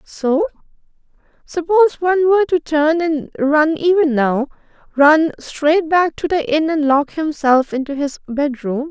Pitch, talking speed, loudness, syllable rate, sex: 310 Hz, 150 wpm, -16 LUFS, 4.2 syllables/s, female